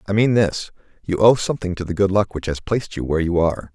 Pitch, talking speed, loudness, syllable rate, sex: 95 Hz, 275 wpm, -20 LUFS, 6.7 syllables/s, male